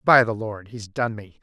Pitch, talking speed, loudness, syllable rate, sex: 110 Hz, 255 wpm, -23 LUFS, 4.5 syllables/s, male